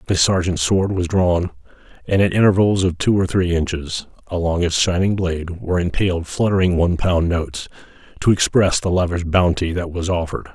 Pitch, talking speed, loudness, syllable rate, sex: 90 Hz, 175 wpm, -19 LUFS, 5.5 syllables/s, male